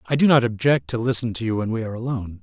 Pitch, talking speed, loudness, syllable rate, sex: 115 Hz, 295 wpm, -21 LUFS, 7.4 syllables/s, male